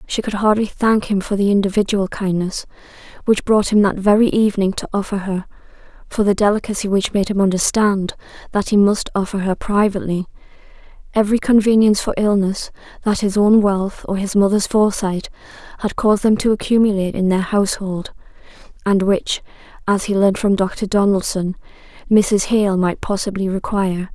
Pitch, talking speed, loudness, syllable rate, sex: 200 Hz, 155 wpm, -17 LUFS, 5.5 syllables/s, female